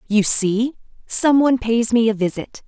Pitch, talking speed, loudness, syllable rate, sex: 230 Hz, 180 wpm, -18 LUFS, 4.5 syllables/s, female